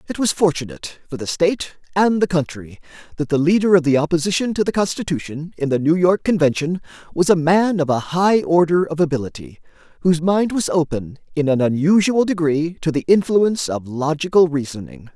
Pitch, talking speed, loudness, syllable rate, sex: 165 Hz, 180 wpm, -18 LUFS, 5.7 syllables/s, male